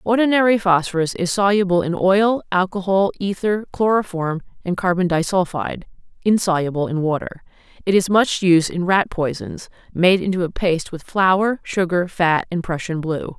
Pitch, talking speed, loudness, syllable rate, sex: 185 Hz, 150 wpm, -19 LUFS, 5.0 syllables/s, female